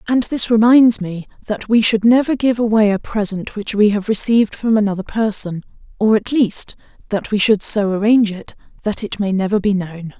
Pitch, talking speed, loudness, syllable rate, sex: 210 Hz, 200 wpm, -16 LUFS, 5.2 syllables/s, female